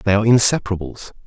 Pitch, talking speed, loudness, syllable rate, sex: 105 Hz, 140 wpm, -17 LUFS, 7.8 syllables/s, male